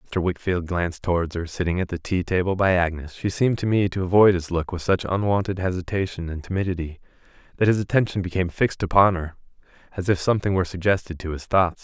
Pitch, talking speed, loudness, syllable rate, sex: 90 Hz, 215 wpm, -23 LUFS, 6.6 syllables/s, male